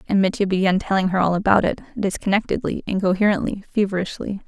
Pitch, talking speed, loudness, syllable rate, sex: 195 Hz, 145 wpm, -21 LUFS, 6.4 syllables/s, female